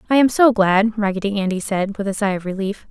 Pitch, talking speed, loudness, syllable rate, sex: 205 Hz, 250 wpm, -18 LUFS, 5.9 syllables/s, female